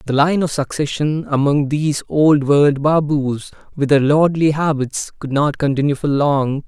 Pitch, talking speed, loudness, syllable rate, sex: 145 Hz, 160 wpm, -17 LUFS, 4.4 syllables/s, male